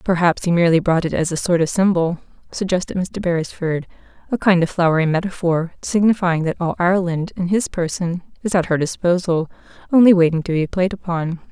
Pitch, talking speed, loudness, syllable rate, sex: 175 Hz, 180 wpm, -18 LUFS, 5.8 syllables/s, female